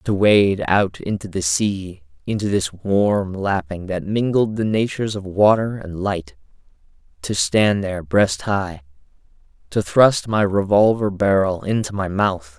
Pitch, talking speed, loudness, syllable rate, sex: 95 Hz, 150 wpm, -19 LUFS, 4.1 syllables/s, male